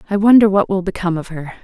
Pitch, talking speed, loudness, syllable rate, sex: 190 Hz, 255 wpm, -15 LUFS, 7.4 syllables/s, female